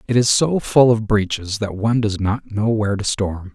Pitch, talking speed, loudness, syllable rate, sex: 105 Hz, 235 wpm, -18 LUFS, 5.0 syllables/s, male